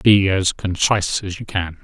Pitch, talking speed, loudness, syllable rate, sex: 95 Hz, 195 wpm, -19 LUFS, 4.5 syllables/s, male